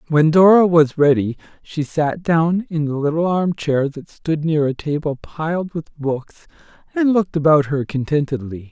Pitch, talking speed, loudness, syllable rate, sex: 155 Hz, 165 wpm, -18 LUFS, 4.6 syllables/s, male